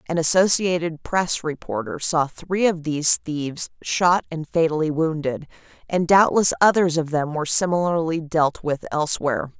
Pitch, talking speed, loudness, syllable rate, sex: 160 Hz, 145 wpm, -21 LUFS, 4.9 syllables/s, female